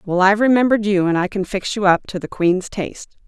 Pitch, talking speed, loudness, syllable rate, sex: 195 Hz, 255 wpm, -18 LUFS, 6.3 syllables/s, female